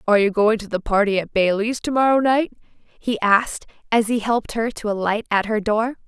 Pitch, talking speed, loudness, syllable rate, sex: 220 Hz, 210 wpm, -20 LUFS, 5.4 syllables/s, female